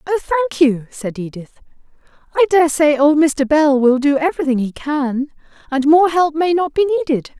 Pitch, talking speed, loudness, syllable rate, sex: 295 Hz, 185 wpm, -16 LUFS, 5.3 syllables/s, female